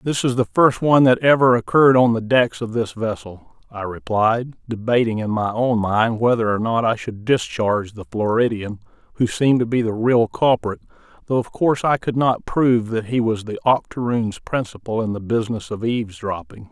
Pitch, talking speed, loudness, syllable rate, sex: 115 Hz, 195 wpm, -19 LUFS, 5.2 syllables/s, male